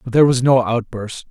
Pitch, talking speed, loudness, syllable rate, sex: 120 Hz, 230 wpm, -16 LUFS, 5.8 syllables/s, male